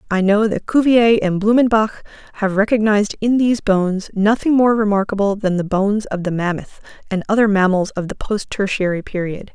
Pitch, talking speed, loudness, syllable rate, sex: 205 Hz, 175 wpm, -17 LUFS, 5.6 syllables/s, female